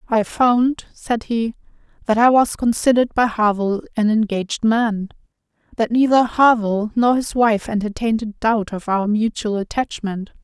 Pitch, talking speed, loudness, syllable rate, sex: 225 Hz, 150 wpm, -18 LUFS, 4.9 syllables/s, female